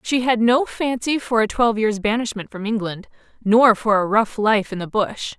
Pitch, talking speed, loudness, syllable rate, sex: 220 Hz, 210 wpm, -19 LUFS, 4.9 syllables/s, female